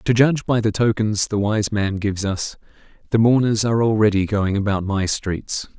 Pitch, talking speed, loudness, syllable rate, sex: 105 Hz, 185 wpm, -19 LUFS, 5.1 syllables/s, male